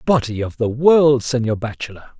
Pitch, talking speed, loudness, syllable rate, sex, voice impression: 125 Hz, 165 wpm, -17 LUFS, 5.2 syllables/s, male, masculine, adult-like, tensed, powerful, slightly bright, slightly soft, clear, cool, slightly intellectual, wild, lively, slightly kind, slightly light